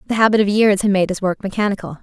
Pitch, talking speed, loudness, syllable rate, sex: 200 Hz, 265 wpm, -17 LUFS, 7.1 syllables/s, female